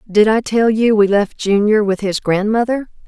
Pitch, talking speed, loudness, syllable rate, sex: 210 Hz, 195 wpm, -15 LUFS, 4.8 syllables/s, female